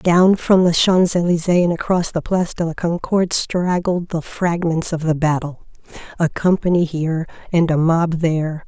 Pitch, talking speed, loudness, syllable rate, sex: 170 Hz, 175 wpm, -18 LUFS, 4.8 syllables/s, female